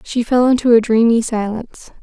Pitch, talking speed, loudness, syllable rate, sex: 235 Hz, 180 wpm, -14 LUFS, 5.4 syllables/s, female